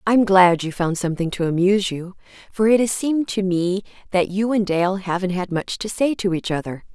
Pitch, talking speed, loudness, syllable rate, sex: 190 Hz, 225 wpm, -20 LUFS, 5.6 syllables/s, female